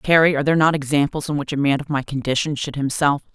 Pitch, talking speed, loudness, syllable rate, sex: 145 Hz, 250 wpm, -20 LUFS, 6.9 syllables/s, female